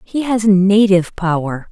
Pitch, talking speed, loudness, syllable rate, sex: 195 Hz, 140 wpm, -14 LUFS, 4.4 syllables/s, female